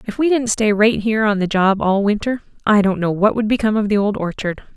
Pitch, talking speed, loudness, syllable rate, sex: 210 Hz, 265 wpm, -17 LUFS, 6.0 syllables/s, female